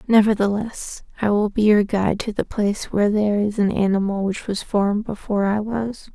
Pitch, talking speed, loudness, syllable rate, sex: 205 Hz, 195 wpm, -21 LUFS, 5.5 syllables/s, female